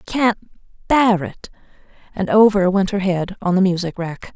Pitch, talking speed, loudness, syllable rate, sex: 195 Hz, 180 wpm, -18 LUFS, 5.0 syllables/s, female